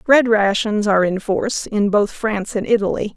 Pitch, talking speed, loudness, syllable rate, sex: 210 Hz, 190 wpm, -18 LUFS, 5.1 syllables/s, female